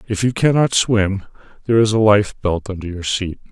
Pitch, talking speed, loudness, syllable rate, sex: 105 Hz, 205 wpm, -17 LUFS, 5.2 syllables/s, male